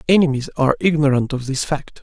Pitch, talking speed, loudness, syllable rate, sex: 140 Hz, 180 wpm, -18 LUFS, 6.2 syllables/s, male